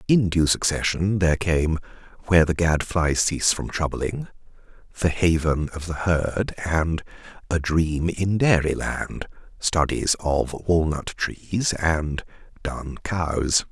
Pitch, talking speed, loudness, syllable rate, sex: 85 Hz, 125 wpm, -23 LUFS, 3.7 syllables/s, male